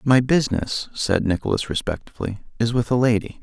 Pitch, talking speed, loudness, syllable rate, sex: 115 Hz, 160 wpm, -22 LUFS, 5.4 syllables/s, male